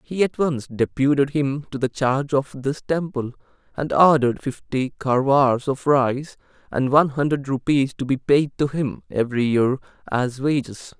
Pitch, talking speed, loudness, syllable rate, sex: 135 Hz, 165 wpm, -21 LUFS, 4.7 syllables/s, male